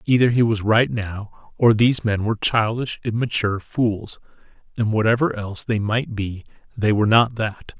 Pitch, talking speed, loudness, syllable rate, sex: 110 Hz, 160 wpm, -20 LUFS, 5.0 syllables/s, male